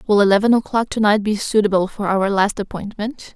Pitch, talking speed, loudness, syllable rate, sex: 205 Hz, 195 wpm, -18 LUFS, 5.6 syllables/s, female